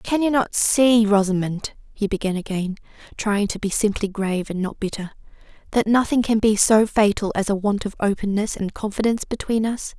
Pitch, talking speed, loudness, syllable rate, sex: 210 Hz, 185 wpm, -21 LUFS, 5.2 syllables/s, female